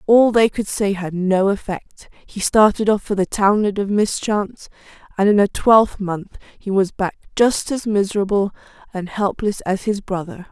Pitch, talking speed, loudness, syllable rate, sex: 200 Hz, 170 wpm, -18 LUFS, 4.6 syllables/s, female